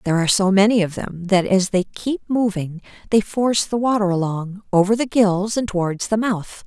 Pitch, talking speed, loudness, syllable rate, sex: 200 Hz, 205 wpm, -19 LUFS, 5.3 syllables/s, female